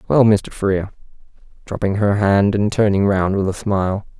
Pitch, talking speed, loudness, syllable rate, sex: 100 Hz, 170 wpm, -17 LUFS, 5.0 syllables/s, male